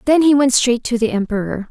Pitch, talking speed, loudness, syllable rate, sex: 245 Hz, 245 wpm, -16 LUFS, 5.7 syllables/s, female